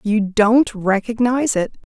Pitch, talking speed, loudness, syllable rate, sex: 220 Hz, 125 wpm, -17 LUFS, 4.1 syllables/s, female